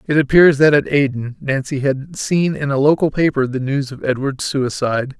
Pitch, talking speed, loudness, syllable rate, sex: 140 Hz, 195 wpm, -17 LUFS, 5.0 syllables/s, male